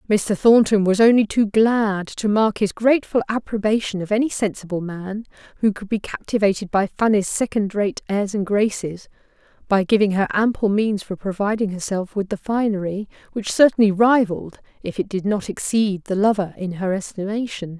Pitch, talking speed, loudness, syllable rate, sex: 205 Hz, 170 wpm, -20 LUFS, 5.1 syllables/s, female